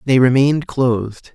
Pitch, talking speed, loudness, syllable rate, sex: 130 Hz, 135 wpm, -16 LUFS, 5.0 syllables/s, male